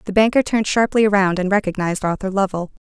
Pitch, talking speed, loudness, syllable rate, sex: 195 Hz, 190 wpm, -18 LUFS, 6.5 syllables/s, female